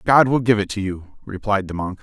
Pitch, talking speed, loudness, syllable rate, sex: 105 Hz, 265 wpm, -20 LUFS, 5.4 syllables/s, male